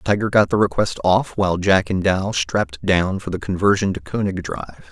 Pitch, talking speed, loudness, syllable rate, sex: 95 Hz, 205 wpm, -19 LUFS, 5.2 syllables/s, male